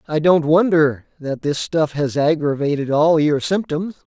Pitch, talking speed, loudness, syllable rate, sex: 155 Hz, 160 wpm, -18 LUFS, 4.4 syllables/s, male